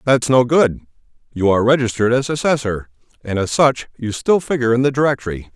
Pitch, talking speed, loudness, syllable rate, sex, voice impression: 125 Hz, 185 wpm, -17 LUFS, 6.3 syllables/s, male, masculine, adult-like, thick, tensed, powerful, clear, fluent, slightly raspy, cool, intellectual, mature, wild, lively, slightly kind